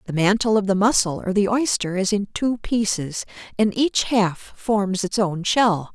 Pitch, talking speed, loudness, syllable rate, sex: 205 Hz, 190 wpm, -21 LUFS, 4.2 syllables/s, female